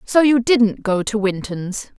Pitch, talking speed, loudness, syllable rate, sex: 220 Hz, 180 wpm, -18 LUFS, 3.8 syllables/s, female